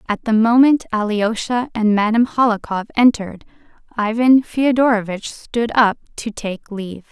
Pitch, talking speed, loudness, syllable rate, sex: 225 Hz, 125 wpm, -17 LUFS, 4.8 syllables/s, female